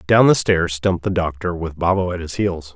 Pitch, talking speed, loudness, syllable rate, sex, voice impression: 90 Hz, 240 wpm, -19 LUFS, 5.4 syllables/s, male, masculine, adult-like, thick, tensed, powerful, slightly muffled, cool, calm, mature, friendly, reassuring, wild, lively, slightly strict